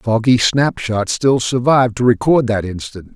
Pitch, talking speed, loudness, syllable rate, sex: 120 Hz, 150 wpm, -15 LUFS, 4.8 syllables/s, male